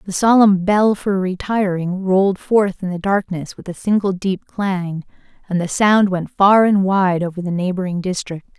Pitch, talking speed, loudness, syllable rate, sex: 190 Hz, 180 wpm, -17 LUFS, 4.6 syllables/s, female